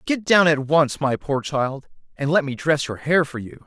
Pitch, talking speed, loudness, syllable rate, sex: 145 Hz, 245 wpm, -20 LUFS, 4.6 syllables/s, male